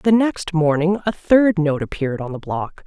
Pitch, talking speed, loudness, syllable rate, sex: 170 Hz, 210 wpm, -19 LUFS, 4.7 syllables/s, female